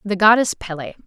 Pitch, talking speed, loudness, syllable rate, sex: 200 Hz, 170 wpm, -16 LUFS, 5.6 syllables/s, female